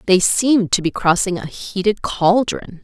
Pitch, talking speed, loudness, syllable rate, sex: 195 Hz, 170 wpm, -17 LUFS, 4.5 syllables/s, female